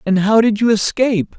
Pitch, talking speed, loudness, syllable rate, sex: 215 Hz, 215 wpm, -15 LUFS, 5.5 syllables/s, male